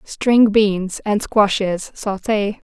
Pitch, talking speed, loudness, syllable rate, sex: 205 Hz, 110 wpm, -18 LUFS, 2.8 syllables/s, female